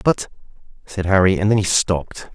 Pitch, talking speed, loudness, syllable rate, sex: 95 Hz, 180 wpm, -18 LUFS, 5.3 syllables/s, male